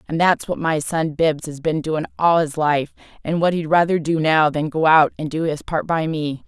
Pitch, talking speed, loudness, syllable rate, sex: 160 Hz, 250 wpm, -19 LUFS, 4.7 syllables/s, female